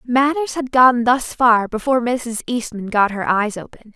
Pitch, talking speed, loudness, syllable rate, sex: 240 Hz, 180 wpm, -17 LUFS, 4.7 syllables/s, female